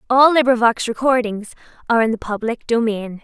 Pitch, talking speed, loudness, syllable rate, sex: 235 Hz, 150 wpm, -17 LUFS, 5.6 syllables/s, female